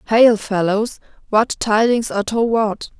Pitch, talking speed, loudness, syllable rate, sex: 220 Hz, 120 wpm, -17 LUFS, 4.2 syllables/s, female